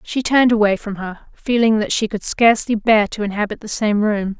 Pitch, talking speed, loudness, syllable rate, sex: 215 Hz, 220 wpm, -17 LUFS, 5.5 syllables/s, female